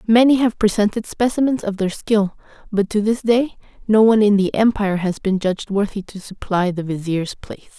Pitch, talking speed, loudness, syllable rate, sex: 205 Hz, 195 wpm, -18 LUFS, 5.5 syllables/s, female